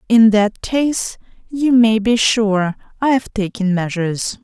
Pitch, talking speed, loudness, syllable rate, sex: 220 Hz, 135 wpm, -16 LUFS, 3.8 syllables/s, female